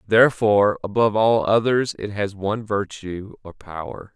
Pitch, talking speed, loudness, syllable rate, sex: 105 Hz, 145 wpm, -20 LUFS, 4.9 syllables/s, male